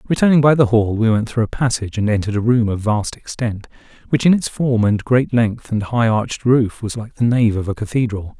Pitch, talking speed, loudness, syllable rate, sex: 115 Hz, 245 wpm, -17 LUFS, 5.7 syllables/s, male